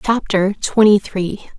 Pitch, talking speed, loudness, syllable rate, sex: 200 Hz, 115 wpm, -16 LUFS, 3.5 syllables/s, female